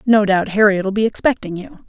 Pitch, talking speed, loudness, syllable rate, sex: 205 Hz, 190 wpm, -16 LUFS, 5.1 syllables/s, female